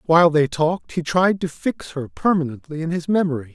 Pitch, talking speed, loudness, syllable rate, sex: 160 Hz, 205 wpm, -21 LUFS, 5.6 syllables/s, male